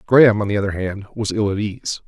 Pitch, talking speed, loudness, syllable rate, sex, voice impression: 105 Hz, 260 wpm, -19 LUFS, 6.1 syllables/s, male, masculine, adult-like, slightly thick, cool, slightly calm, slightly wild